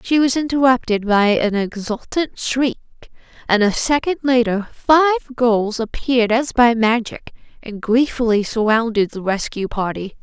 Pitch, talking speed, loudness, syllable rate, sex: 235 Hz, 135 wpm, -17 LUFS, 4.5 syllables/s, female